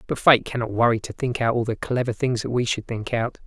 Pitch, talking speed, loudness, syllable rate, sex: 120 Hz, 275 wpm, -23 LUFS, 5.8 syllables/s, male